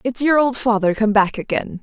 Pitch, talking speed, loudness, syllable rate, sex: 230 Hz, 230 wpm, -17 LUFS, 5.2 syllables/s, female